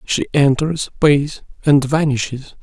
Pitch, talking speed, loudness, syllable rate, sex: 140 Hz, 115 wpm, -16 LUFS, 3.8 syllables/s, male